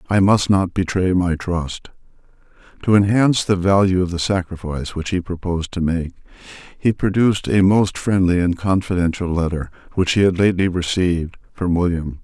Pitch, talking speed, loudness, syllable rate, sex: 90 Hz, 160 wpm, -19 LUFS, 5.4 syllables/s, male